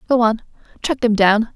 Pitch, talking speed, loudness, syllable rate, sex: 230 Hz, 195 wpm, -17 LUFS, 5.1 syllables/s, female